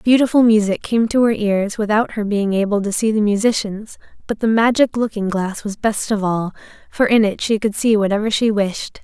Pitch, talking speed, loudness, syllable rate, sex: 215 Hz, 215 wpm, -17 LUFS, 5.2 syllables/s, female